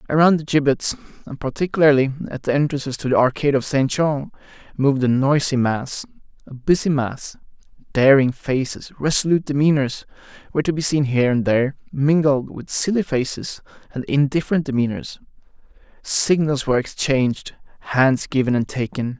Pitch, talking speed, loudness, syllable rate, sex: 140 Hz, 145 wpm, -19 LUFS, 5.5 syllables/s, male